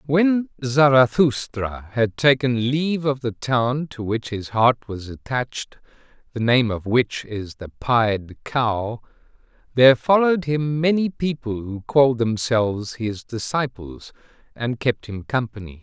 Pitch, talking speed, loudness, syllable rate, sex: 125 Hz, 135 wpm, -21 LUFS, 4.0 syllables/s, male